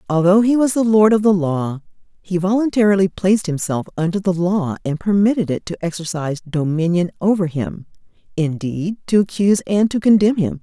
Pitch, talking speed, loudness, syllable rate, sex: 185 Hz, 170 wpm, -17 LUFS, 5.4 syllables/s, female